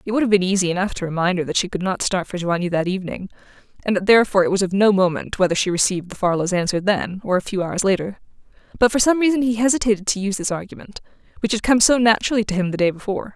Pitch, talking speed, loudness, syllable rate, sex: 195 Hz, 260 wpm, -19 LUFS, 7.4 syllables/s, female